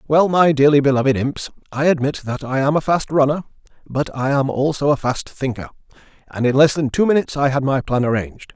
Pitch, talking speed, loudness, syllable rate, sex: 140 Hz, 215 wpm, -18 LUFS, 5.8 syllables/s, male